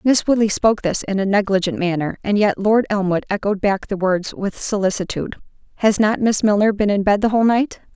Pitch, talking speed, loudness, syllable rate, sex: 205 Hz, 210 wpm, -18 LUFS, 5.7 syllables/s, female